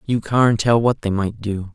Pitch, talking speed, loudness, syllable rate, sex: 110 Hz, 240 wpm, -19 LUFS, 4.2 syllables/s, male